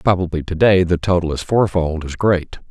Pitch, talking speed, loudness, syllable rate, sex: 90 Hz, 220 wpm, -17 LUFS, 5.2 syllables/s, male